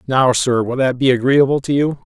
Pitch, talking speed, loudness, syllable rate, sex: 130 Hz, 230 wpm, -16 LUFS, 5.3 syllables/s, male